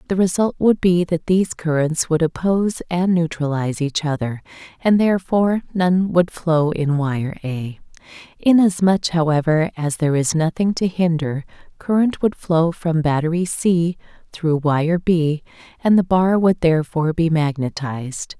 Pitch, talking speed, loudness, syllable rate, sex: 165 Hz, 145 wpm, -19 LUFS, 4.6 syllables/s, female